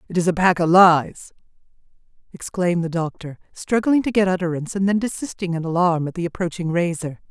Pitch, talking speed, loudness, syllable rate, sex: 175 Hz, 180 wpm, -20 LUFS, 5.9 syllables/s, female